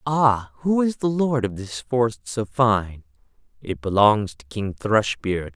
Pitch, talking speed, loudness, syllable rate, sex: 115 Hz, 160 wpm, -22 LUFS, 3.8 syllables/s, male